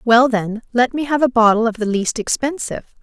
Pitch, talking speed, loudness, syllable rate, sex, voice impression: 240 Hz, 220 wpm, -17 LUFS, 5.4 syllables/s, female, very feminine, slightly young, very thin, slightly tensed, slightly powerful, bright, slightly soft, very clear, fluent, cute, slightly cool, intellectual, very refreshing, sincere, calm, friendly, reassuring, unique, elegant, slightly wild, sweet, lively, slightly strict, slightly intense, slightly sharp